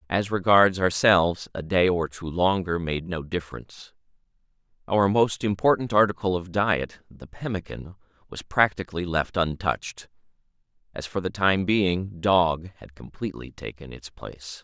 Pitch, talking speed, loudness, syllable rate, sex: 90 Hz, 140 wpm, -24 LUFS, 4.7 syllables/s, male